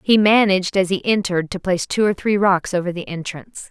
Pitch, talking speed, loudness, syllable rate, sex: 190 Hz, 225 wpm, -18 LUFS, 6.1 syllables/s, female